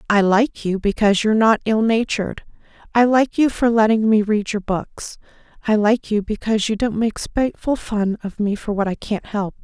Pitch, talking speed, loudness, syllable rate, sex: 215 Hz, 200 wpm, -19 LUFS, 5.3 syllables/s, female